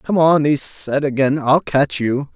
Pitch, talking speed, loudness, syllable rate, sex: 140 Hz, 205 wpm, -17 LUFS, 4.0 syllables/s, male